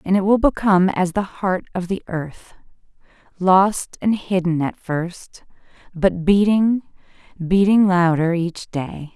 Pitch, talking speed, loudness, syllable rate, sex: 185 Hz, 140 wpm, -19 LUFS, 3.8 syllables/s, female